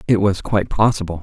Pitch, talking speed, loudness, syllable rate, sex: 100 Hz, 195 wpm, -18 LUFS, 6.5 syllables/s, male